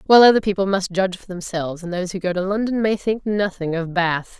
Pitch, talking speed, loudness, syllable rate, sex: 190 Hz, 245 wpm, -20 LUFS, 6.2 syllables/s, female